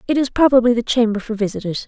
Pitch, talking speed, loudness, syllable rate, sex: 235 Hz, 225 wpm, -17 LUFS, 7.0 syllables/s, female